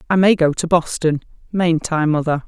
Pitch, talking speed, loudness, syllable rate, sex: 165 Hz, 195 wpm, -18 LUFS, 5.0 syllables/s, female